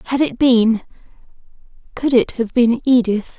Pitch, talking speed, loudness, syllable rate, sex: 240 Hz, 125 wpm, -16 LUFS, 4.5 syllables/s, female